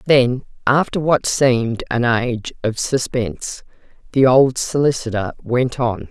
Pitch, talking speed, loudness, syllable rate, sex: 125 Hz, 130 wpm, -18 LUFS, 4.2 syllables/s, female